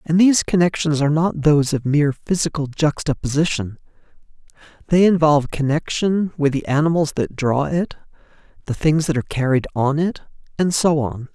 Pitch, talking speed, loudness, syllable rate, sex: 150 Hz, 155 wpm, -19 LUFS, 5.5 syllables/s, male